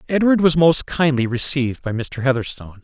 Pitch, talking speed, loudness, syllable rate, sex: 140 Hz, 170 wpm, -18 LUFS, 5.7 syllables/s, male